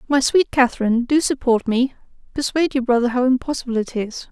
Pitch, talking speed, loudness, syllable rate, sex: 255 Hz, 180 wpm, -19 LUFS, 6.1 syllables/s, female